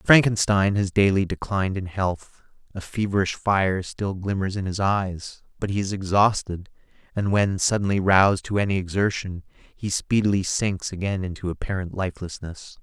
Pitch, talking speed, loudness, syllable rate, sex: 95 Hz, 150 wpm, -23 LUFS, 4.9 syllables/s, male